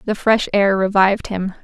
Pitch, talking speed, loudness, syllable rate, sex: 200 Hz, 185 wpm, -17 LUFS, 5.0 syllables/s, female